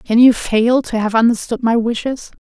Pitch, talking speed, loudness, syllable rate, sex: 235 Hz, 200 wpm, -15 LUFS, 4.8 syllables/s, female